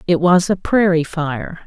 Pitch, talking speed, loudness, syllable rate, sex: 170 Hz, 180 wpm, -16 LUFS, 4.1 syllables/s, female